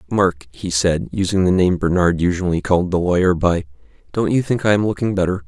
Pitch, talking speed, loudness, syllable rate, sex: 90 Hz, 210 wpm, -18 LUFS, 5.8 syllables/s, male